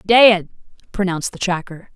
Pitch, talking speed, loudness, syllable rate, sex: 190 Hz, 125 wpm, -17 LUFS, 5.0 syllables/s, female